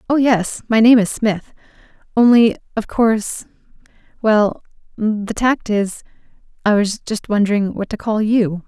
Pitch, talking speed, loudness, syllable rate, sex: 215 Hz, 140 wpm, -17 LUFS, 4.2 syllables/s, female